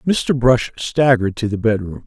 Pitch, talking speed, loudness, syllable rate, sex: 120 Hz, 175 wpm, -17 LUFS, 4.4 syllables/s, male